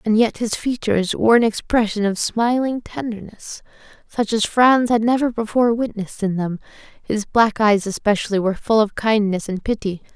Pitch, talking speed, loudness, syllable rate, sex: 220 Hz, 170 wpm, -19 LUFS, 5.2 syllables/s, female